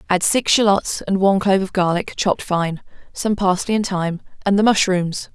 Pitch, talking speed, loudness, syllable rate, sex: 190 Hz, 190 wpm, -18 LUFS, 5.4 syllables/s, female